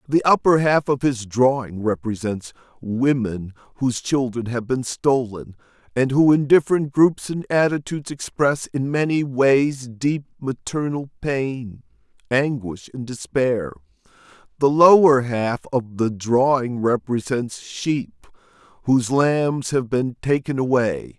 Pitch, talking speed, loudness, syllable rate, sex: 130 Hz, 125 wpm, -20 LUFS, 4.0 syllables/s, male